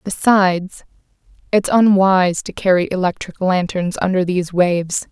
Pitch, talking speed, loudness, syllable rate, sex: 185 Hz, 115 wpm, -16 LUFS, 4.9 syllables/s, female